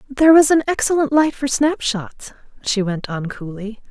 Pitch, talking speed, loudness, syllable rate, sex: 250 Hz, 170 wpm, -17 LUFS, 4.8 syllables/s, female